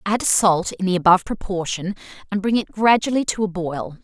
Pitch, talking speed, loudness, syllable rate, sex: 195 Hz, 195 wpm, -20 LUFS, 5.3 syllables/s, female